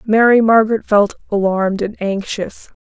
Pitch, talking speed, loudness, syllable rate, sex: 210 Hz, 125 wpm, -15 LUFS, 4.8 syllables/s, female